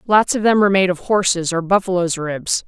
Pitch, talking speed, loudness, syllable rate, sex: 185 Hz, 225 wpm, -17 LUFS, 5.5 syllables/s, female